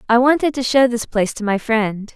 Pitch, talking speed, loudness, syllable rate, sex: 235 Hz, 250 wpm, -17 LUFS, 5.6 syllables/s, female